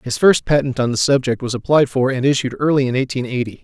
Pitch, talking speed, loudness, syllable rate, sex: 130 Hz, 250 wpm, -17 LUFS, 6.2 syllables/s, male